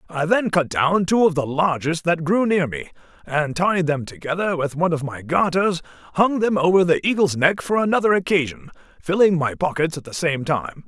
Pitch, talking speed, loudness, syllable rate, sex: 165 Hz, 205 wpm, -20 LUFS, 5.4 syllables/s, male